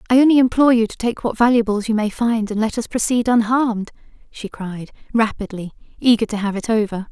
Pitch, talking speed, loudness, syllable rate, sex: 225 Hz, 200 wpm, -18 LUFS, 6.0 syllables/s, female